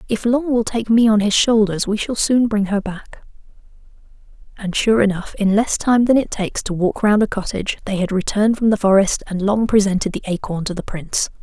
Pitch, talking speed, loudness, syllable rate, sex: 210 Hz, 220 wpm, -18 LUFS, 5.6 syllables/s, female